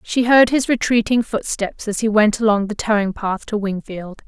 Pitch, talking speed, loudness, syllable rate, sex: 215 Hz, 195 wpm, -18 LUFS, 4.8 syllables/s, female